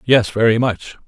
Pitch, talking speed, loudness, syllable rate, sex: 110 Hz, 170 wpm, -16 LUFS, 4.7 syllables/s, male